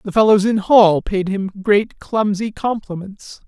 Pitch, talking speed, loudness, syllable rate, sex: 205 Hz, 155 wpm, -16 LUFS, 4.0 syllables/s, male